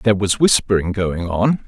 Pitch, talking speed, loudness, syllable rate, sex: 100 Hz, 180 wpm, -17 LUFS, 4.9 syllables/s, male